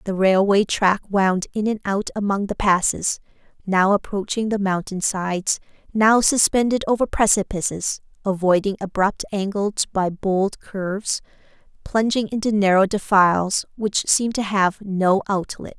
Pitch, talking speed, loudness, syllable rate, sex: 200 Hz, 135 wpm, -20 LUFS, 4.5 syllables/s, female